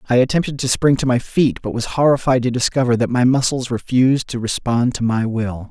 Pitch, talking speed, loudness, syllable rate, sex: 125 Hz, 220 wpm, -17 LUFS, 5.7 syllables/s, male